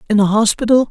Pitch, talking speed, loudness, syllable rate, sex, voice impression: 220 Hz, 200 wpm, -14 LUFS, 7.1 syllables/s, male, very masculine, adult-like, slightly middle-aged, thick, slightly tensed, slightly weak, slightly bright, slightly soft, clear, fluent, cool, very intellectual, refreshing, very sincere, calm, friendly, reassuring, very unique, slightly elegant, slightly wild, sweet, lively, kind, slightly intense, slightly modest, slightly light